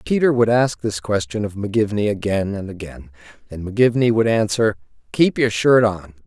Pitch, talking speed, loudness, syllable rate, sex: 105 Hz, 170 wpm, -18 LUFS, 5.4 syllables/s, male